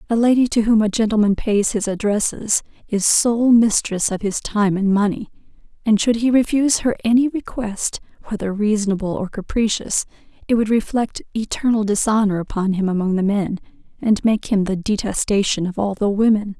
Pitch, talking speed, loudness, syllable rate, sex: 210 Hz, 170 wpm, -19 LUFS, 5.2 syllables/s, female